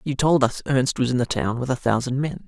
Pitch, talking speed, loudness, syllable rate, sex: 130 Hz, 290 wpm, -22 LUFS, 5.6 syllables/s, male